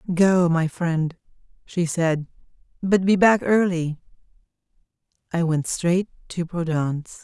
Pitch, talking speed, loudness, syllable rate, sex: 175 Hz, 115 wpm, -22 LUFS, 3.9 syllables/s, female